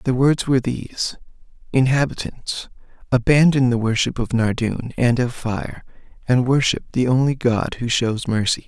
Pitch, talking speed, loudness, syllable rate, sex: 125 Hz, 145 wpm, -20 LUFS, 4.7 syllables/s, male